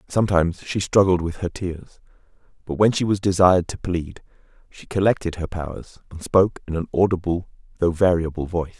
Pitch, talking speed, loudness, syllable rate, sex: 90 Hz, 170 wpm, -21 LUFS, 5.9 syllables/s, male